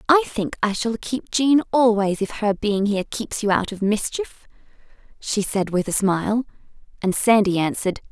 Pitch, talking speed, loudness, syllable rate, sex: 210 Hz, 175 wpm, -21 LUFS, 4.9 syllables/s, female